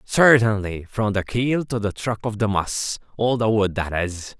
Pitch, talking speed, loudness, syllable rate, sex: 110 Hz, 190 wpm, -21 LUFS, 4.2 syllables/s, male